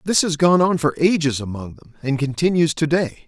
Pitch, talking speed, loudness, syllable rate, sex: 155 Hz, 200 wpm, -19 LUFS, 5.4 syllables/s, male